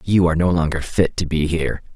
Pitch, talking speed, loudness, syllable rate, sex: 80 Hz, 245 wpm, -19 LUFS, 6.3 syllables/s, male